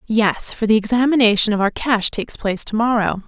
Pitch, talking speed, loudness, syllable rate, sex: 220 Hz, 200 wpm, -17 LUFS, 5.8 syllables/s, female